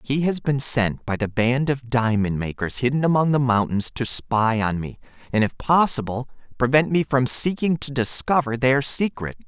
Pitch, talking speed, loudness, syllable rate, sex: 130 Hz, 185 wpm, -21 LUFS, 4.7 syllables/s, male